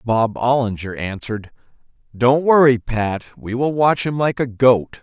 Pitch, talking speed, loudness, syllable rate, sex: 120 Hz, 155 wpm, -18 LUFS, 4.2 syllables/s, male